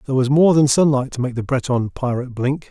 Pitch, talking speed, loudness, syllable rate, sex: 135 Hz, 245 wpm, -18 LUFS, 6.2 syllables/s, male